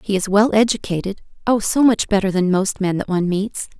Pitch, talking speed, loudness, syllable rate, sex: 200 Hz, 205 wpm, -18 LUFS, 5.7 syllables/s, female